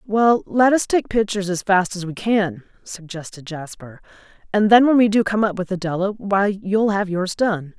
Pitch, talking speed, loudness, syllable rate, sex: 200 Hz, 200 wpm, -19 LUFS, 4.8 syllables/s, female